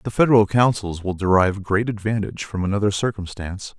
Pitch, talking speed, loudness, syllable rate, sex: 100 Hz, 160 wpm, -21 LUFS, 6.3 syllables/s, male